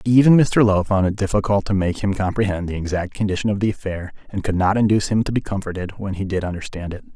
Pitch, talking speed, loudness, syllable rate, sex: 100 Hz, 245 wpm, -20 LUFS, 6.6 syllables/s, male